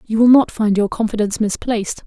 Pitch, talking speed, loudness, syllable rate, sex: 220 Hz, 205 wpm, -16 LUFS, 6.2 syllables/s, female